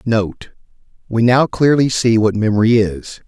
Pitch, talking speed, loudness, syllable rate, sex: 115 Hz, 130 wpm, -15 LUFS, 4.3 syllables/s, male